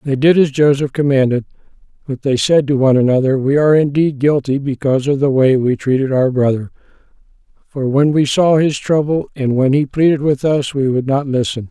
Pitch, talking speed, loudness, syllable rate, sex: 140 Hz, 200 wpm, -14 LUFS, 5.5 syllables/s, male